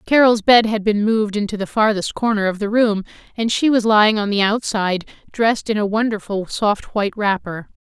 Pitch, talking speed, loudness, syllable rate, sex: 210 Hz, 200 wpm, -18 LUFS, 5.6 syllables/s, female